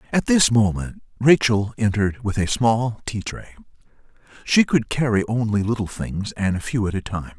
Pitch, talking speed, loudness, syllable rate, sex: 110 Hz, 180 wpm, -21 LUFS, 5.0 syllables/s, male